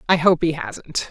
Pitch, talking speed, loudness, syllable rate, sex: 155 Hz, 215 wpm, -20 LUFS, 4.4 syllables/s, female